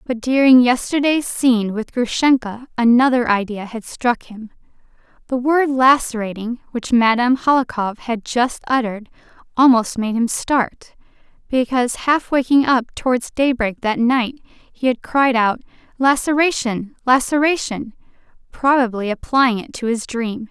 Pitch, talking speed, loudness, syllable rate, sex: 245 Hz, 130 wpm, -17 LUFS, 4.4 syllables/s, female